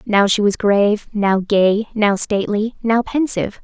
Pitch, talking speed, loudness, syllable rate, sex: 210 Hz, 165 wpm, -17 LUFS, 4.5 syllables/s, female